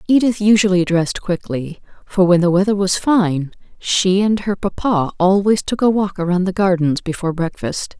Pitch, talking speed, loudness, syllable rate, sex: 190 Hz, 175 wpm, -17 LUFS, 5.0 syllables/s, female